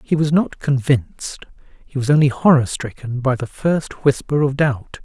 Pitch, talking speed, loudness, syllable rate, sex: 135 Hz, 180 wpm, -18 LUFS, 4.7 syllables/s, male